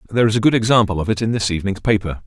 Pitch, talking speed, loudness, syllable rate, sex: 105 Hz, 290 wpm, -18 LUFS, 8.4 syllables/s, male